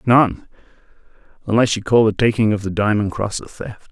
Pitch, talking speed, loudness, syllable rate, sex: 105 Hz, 185 wpm, -18 LUFS, 5.3 syllables/s, male